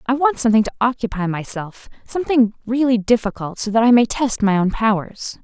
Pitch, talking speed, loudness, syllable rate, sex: 225 Hz, 175 wpm, -18 LUFS, 5.7 syllables/s, female